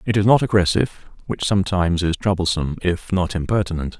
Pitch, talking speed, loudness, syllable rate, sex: 90 Hz, 165 wpm, -20 LUFS, 6.3 syllables/s, male